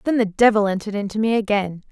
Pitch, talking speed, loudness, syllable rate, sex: 210 Hz, 220 wpm, -19 LUFS, 6.9 syllables/s, female